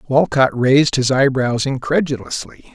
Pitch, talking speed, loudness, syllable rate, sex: 130 Hz, 110 wpm, -16 LUFS, 4.6 syllables/s, male